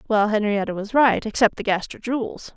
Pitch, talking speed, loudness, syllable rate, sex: 215 Hz, 165 wpm, -21 LUFS, 5.5 syllables/s, female